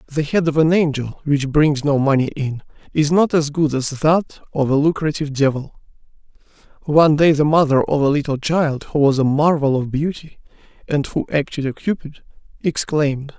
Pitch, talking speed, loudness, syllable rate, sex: 145 Hz, 180 wpm, -18 LUFS, 5.1 syllables/s, male